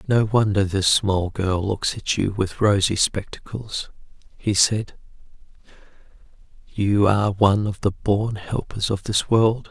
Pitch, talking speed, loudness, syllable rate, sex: 100 Hz, 140 wpm, -21 LUFS, 4.1 syllables/s, male